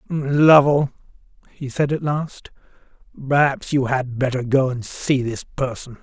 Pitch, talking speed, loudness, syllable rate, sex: 135 Hz, 140 wpm, -19 LUFS, 4.0 syllables/s, male